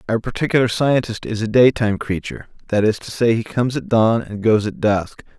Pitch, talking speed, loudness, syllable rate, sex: 115 Hz, 200 wpm, -18 LUFS, 5.7 syllables/s, male